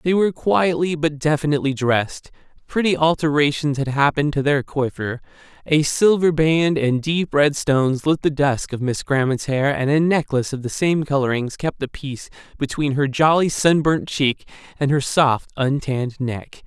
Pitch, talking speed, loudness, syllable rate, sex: 145 Hz, 175 wpm, -19 LUFS, 5.0 syllables/s, male